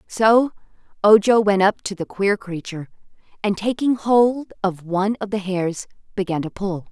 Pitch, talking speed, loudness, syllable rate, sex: 200 Hz, 165 wpm, -20 LUFS, 4.7 syllables/s, female